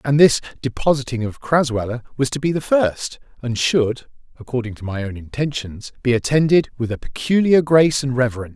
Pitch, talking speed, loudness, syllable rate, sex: 130 Hz, 160 wpm, -19 LUFS, 5.7 syllables/s, male